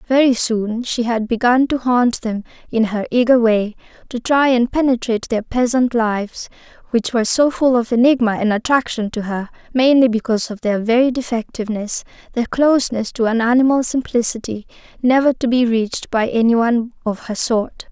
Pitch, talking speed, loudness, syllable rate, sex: 235 Hz, 170 wpm, -17 LUFS, 5.3 syllables/s, female